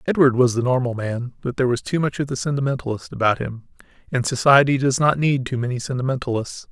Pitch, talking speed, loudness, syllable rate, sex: 130 Hz, 205 wpm, -21 LUFS, 6.3 syllables/s, male